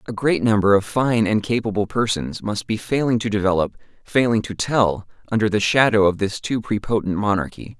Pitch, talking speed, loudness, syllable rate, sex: 105 Hz, 185 wpm, -20 LUFS, 5.3 syllables/s, male